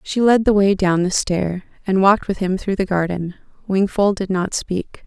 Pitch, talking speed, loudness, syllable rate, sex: 190 Hz, 215 wpm, -18 LUFS, 4.7 syllables/s, female